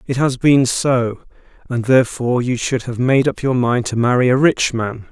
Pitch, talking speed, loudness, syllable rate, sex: 125 Hz, 210 wpm, -16 LUFS, 4.9 syllables/s, male